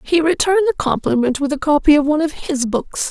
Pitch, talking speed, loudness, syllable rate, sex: 295 Hz, 230 wpm, -17 LUFS, 6.2 syllables/s, female